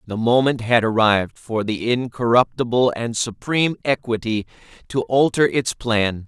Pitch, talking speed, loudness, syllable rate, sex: 120 Hz, 135 wpm, -20 LUFS, 4.6 syllables/s, male